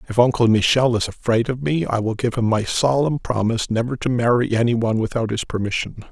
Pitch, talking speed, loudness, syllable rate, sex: 120 Hz, 215 wpm, -20 LUFS, 6.0 syllables/s, male